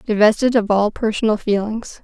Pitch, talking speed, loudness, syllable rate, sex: 215 Hz, 145 wpm, -18 LUFS, 5.4 syllables/s, female